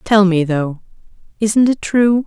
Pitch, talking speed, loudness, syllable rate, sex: 200 Hz, 160 wpm, -15 LUFS, 3.6 syllables/s, female